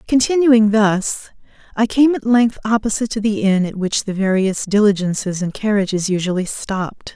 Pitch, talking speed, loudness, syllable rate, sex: 210 Hz, 160 wpm, -17 LUFS, 5.1 syllables/s, female